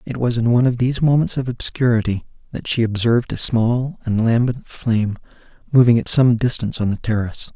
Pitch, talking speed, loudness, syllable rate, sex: 120 Hz, 190 wpm, -18 LUFS, 5.9 syllables/s, male